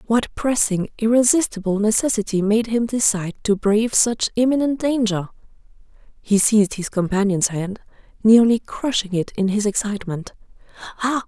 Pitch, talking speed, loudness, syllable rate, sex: 215 Hz, 130 wpm, -19 LUFS, 5.2 syllables/s, female